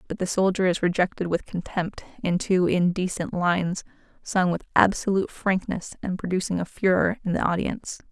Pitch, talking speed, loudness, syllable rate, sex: 180 Hz, 165 wpm, -25 LUFS, 5.6 syllables/s, female